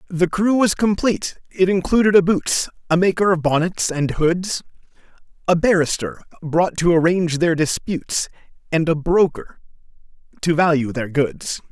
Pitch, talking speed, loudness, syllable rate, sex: 170 Hz, 145 wpm, -19 LUFS, 4.8 syllables/s, male